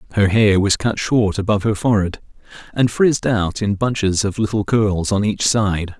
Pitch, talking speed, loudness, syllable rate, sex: 105 Hz, 190 wpm, -17 LUFS, 5.1 syllables/s, male